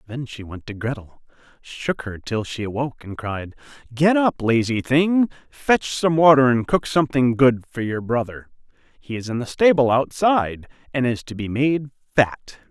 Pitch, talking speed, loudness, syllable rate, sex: 130 Hz, 180 wpm, -20 LUFS, 4.8 syllables/s, male